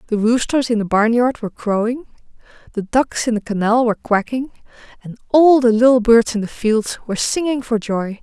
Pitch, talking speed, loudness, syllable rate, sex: 230 Hz, 190 wpm, -17 LUFS, 5.3 syllables/s, female